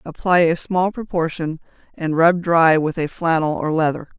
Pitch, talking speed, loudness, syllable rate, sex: 165 Hz, 170 wpm, -18 LUFS, 4.6 syllables/s, female